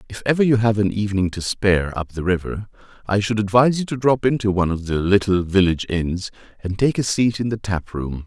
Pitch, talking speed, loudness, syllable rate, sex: 100 Hz, 230 wpm, -20 LUFS, 6.0 syllables/s, male